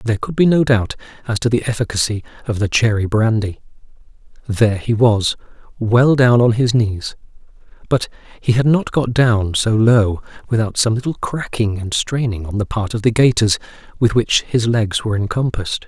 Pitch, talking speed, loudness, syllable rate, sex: 115 Hz, 180 wpm, -17 LUFS, 5.2 syllables/s, male